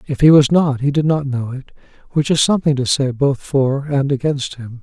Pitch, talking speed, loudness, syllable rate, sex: 140 Hz, 235 wpm, -16 LUFS, 5.1 syllables/s, male